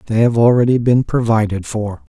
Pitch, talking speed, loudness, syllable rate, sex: 115 Hz, 165 wpm, -15 LUFS, 5.4 syllables/s, male